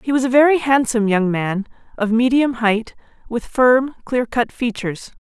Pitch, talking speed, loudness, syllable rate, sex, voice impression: 240 Hz, 160 wpm, -18 LUFS, 4.9 syllables/s, female, very feminine, adult-like, sincere, slightly friendly